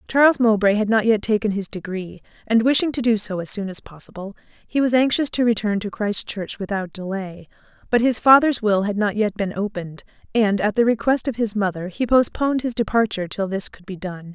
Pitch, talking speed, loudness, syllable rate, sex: 210 Hz, 215 wpm, -20 LUFS, 5.6 syllables/s, female